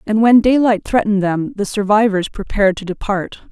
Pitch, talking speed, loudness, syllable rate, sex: 210 Hz, 170 wpm, -16 LUFS, 5.4 syllables/s, female